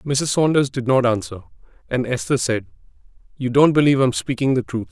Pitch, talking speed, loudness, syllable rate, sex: 130 Hz, 185 wpm, -19 LUFS, 5.7 syllables/s, male